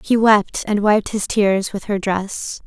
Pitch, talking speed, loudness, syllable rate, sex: 205 Hz, 205 wpm, -18 LUFS, 3.6 syllables/s, female